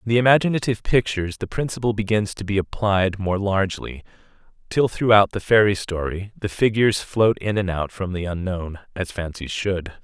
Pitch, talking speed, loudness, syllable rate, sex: 100 Hz, 175 wpm, -21 LUFS, 5.5 syllables/s, male